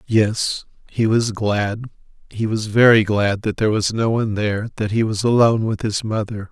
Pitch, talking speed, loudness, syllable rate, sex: 110 Hz, 195 wpm, -19 LUFS, 5.0 syllables/s, male